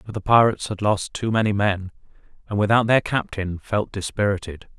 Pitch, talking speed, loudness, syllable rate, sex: 105 Hz, 175 wpm, -21 LUFS, 5.4 syllables/s, male